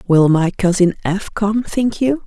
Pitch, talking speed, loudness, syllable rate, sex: 195 Hz, 185 wpm, -16 LUFS, 4.0 syllables/s, female